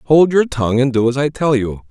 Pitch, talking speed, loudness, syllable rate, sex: 135 Hz, 285 wpm, -15 LUFS, 5.4 syllables/s, male